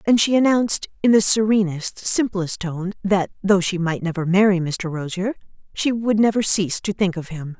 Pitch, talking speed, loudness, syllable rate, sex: 195 Hz, 190 wpm, -20 LUFS, 5.1 syllables/s, female